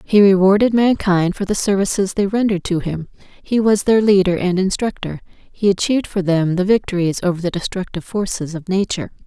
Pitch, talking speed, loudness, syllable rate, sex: 190 Hz, 180 wpm, -17 LUFS, 5.7 syllables/s, female